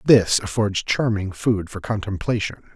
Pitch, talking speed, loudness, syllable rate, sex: 105 Hz, 130 wpm, -22 LUFS, 4.5 syllables/s, male